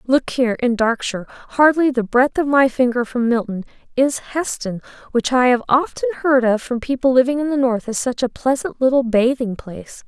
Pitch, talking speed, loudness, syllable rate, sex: 250 Hz, 190 wpm, -18 LUFS, 5.2 syllables/s, female